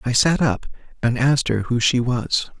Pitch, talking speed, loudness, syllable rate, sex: 125 Hz, 210 wpm, -20 LUFS, 4.8 syllables/s, male